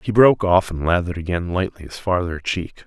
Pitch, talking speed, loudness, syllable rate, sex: 90 Hz, 210 wpm, -20 LUFS, 5.8 syllables/s, male